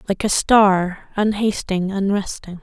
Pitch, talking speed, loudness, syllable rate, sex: 195 Hz, 115 wpm, -18 LUFS, 3.8 syllables/s, female